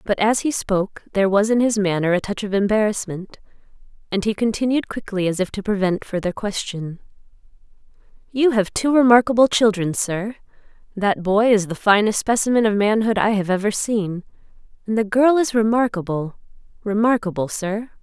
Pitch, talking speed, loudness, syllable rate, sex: 210 Hz, 155 wpm, -19 LUFS, 5.3 syllables/s, female